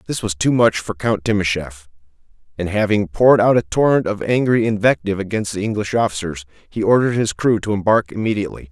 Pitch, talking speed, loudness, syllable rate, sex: 105 Hz, 185 wpm, -18 LUFS, 6.2 syllables/s, male